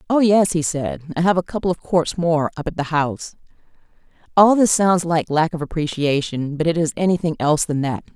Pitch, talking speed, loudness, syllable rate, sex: 165 Hz, 215 wpm, -19 LUFS, 5.6 syllables/s, female